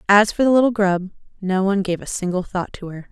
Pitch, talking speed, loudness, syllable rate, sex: 195 Hz, 250 wpm, -19 LUFS, 6.0 syllables/s, female